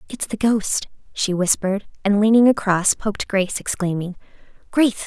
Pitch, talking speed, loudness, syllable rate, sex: 205 Hz, 140 wpm, -20 LUFS, 5.5 syllables/s, female